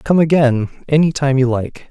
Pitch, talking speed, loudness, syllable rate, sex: 140 Hz, 190 wpm, -15 LUFS, 4.8 syllables/s, male